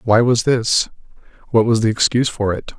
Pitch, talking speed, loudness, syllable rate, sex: 115 Hz, 195 wpm, -17 LUFS, 5.4 syllables/s, male